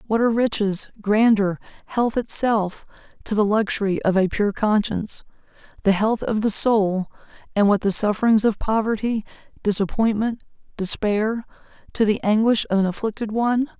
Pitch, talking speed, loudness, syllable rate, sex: 215 Hz, 125 wpm, -21 LUFS, 5.0 syllables/s, female